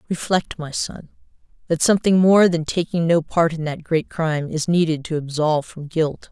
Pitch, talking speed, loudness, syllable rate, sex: 160 Hz, 190 wpm, -20 LUFS, 5.1 syllables/s, female